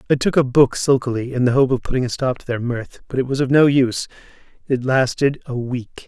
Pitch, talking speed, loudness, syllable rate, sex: 130 Hz, 245 wpm, -19 LUFS, 6.0 syllables/s, male